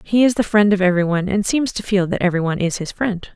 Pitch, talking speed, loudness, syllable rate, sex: 195 Hz, 270 wpm, -18 LUFS, 6.5 syllables/s, female